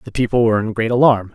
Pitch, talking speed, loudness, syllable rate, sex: 115 Hz, 265 wpm, -16 LUFS, 7.3 syllables/s, male